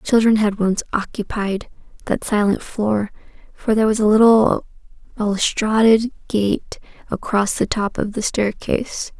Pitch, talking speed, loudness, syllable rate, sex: 210 Hz, 130 wpm, -19 LUFS, 4.4 syllables/s, female